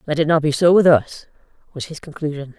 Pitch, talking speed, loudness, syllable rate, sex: 150 Hz, 230 wpm, -16 LUFS, 6.1 syllables/s, female